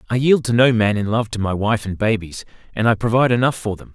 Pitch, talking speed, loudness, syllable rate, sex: 110 Hz, 275 wpm, -18 LUFS, 6.4 syllables/s, male